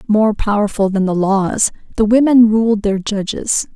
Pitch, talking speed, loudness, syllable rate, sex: 210 Hz, 160 wpm, -15 LUFS, 4.2 syllables/s, female